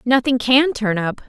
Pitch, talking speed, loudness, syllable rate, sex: 245 Hz, 190 wpm, -17 LUFS, 4.4 syllables/s, female